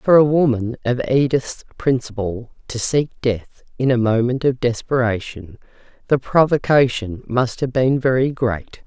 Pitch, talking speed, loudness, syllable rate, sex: 125 Hz, 140 wpm, -19 LUFS, 4.3 syllables/s, female